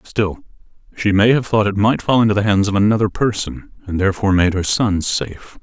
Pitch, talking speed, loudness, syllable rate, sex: 100 Hz, 215 wpm, -17 LUFS, 5.8 syllables/s, male